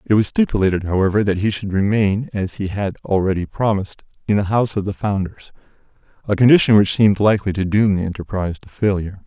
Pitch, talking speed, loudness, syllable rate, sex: 100 Hz, 195 wpm, -18 LUFS, 6.4 syllables/s, male